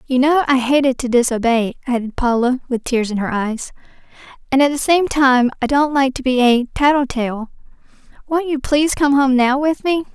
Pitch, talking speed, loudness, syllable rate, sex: 265 Hz, 200 wpm, -16 LUFS, 5.1 syllables/s, female